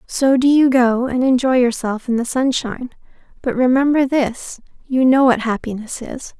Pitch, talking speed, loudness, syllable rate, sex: 250 Hz, 160 wpm, -17 LUFS, 4.7 syllables/s, female